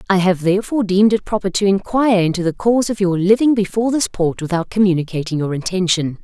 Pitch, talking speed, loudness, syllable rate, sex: 195 Hz, 200 wpm, -17 LUFS, 6.6 syllables/s, female